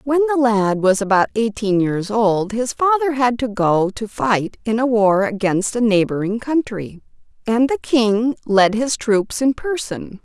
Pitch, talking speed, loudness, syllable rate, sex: 225 Hz, 175 wpm, -18 LUFS, 4.1 syllables/s, female